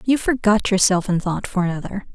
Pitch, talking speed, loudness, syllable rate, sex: 200 Hz, 195 wpm, -19 LUFS, 5.5 syllables/s, female